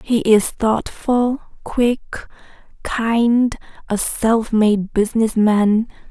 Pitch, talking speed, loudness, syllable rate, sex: 225 Hz, 100 wpm, -18 LUFS, 2.9 syllables/s, female